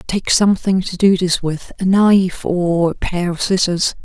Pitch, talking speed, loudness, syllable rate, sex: 185 Hz, 195 wpm, -16 LUFS, 4.5 syllables/s, female